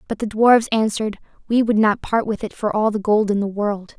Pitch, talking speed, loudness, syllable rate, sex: 215 Hz, 255 wpm, -19 LUFS, 5.4 syllables/s, female